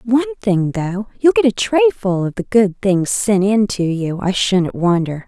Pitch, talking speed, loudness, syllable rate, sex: 205 Hz, 205 wpm, -16 LUFS, 4.3 syllables/s, female